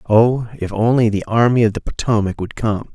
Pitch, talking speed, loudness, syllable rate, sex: 110 Hz, 205 wpm, -17 LUFS, 5.1 syllables/s, male